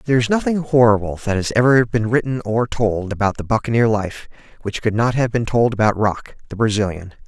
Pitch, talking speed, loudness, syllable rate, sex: 115 Hz, 205 wpm, -18 LUFS, 5.7 syllables/s, male